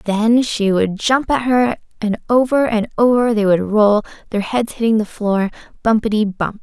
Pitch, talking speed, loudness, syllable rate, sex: 220 Hz, 180 wpm, -17 LUFS, 4.5 syllables/s, female